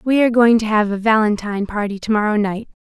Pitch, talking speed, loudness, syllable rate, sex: 215 Hz, 235 wpm, -17 LUFS, 6.5 syllables/s, female